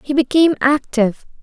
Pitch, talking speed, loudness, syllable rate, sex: 275 Hz, 125 wpm, -16 LUFS, 6.1 syllables/s, female